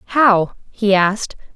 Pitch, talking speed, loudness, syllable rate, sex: 205 Hz, 115 wpm, -16 LUFS, 3.3 syllables/s, female